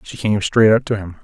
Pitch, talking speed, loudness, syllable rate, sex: 105 Hz, 290 wpm, -16 LUFS, 5.5 syllables/s, male